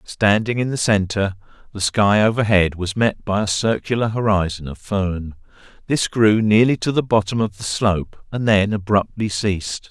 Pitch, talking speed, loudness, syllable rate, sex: 105 Hz, 170 wpm, -19 LUFS, 4.7 syllables/s, male